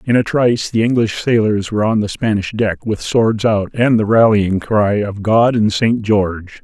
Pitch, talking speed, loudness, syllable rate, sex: 110 Hz, 210 wpm, -15 LUFS, 4.6 syllables/s, male